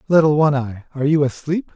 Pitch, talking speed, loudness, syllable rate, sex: 145 Hz, 205 wpm, -18 LUFS, 6.8 syllables/s, male